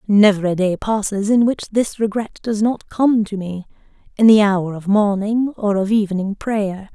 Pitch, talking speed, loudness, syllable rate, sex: 205 Hz, 190 wpm, -18 LUFS, 4.6 syllables/s, female